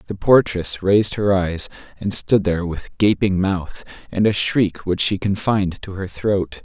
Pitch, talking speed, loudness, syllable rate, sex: 95 Hz, 180 wpm, -19 LUFS, 4.4 syllables/s, male